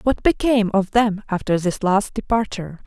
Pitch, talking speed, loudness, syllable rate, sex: 210 Hz, 165 wpm, -20 LUFS, 5.2 syllables/s, female